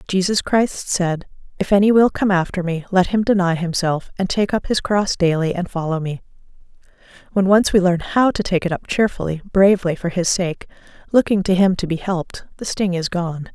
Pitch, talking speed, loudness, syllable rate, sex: 185 Hz, 205 wpm, -18 LUFS, 5.3 syllables/s, female